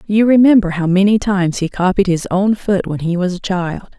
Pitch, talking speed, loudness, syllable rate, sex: 190 Hz, 225 wpm, -15 LUFS, 5.3 syllables/s, female